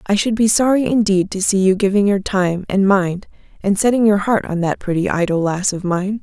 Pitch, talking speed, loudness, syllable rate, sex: 200 Hz, 230 wpm, -17 LUFS, 5.2 syllables/s, female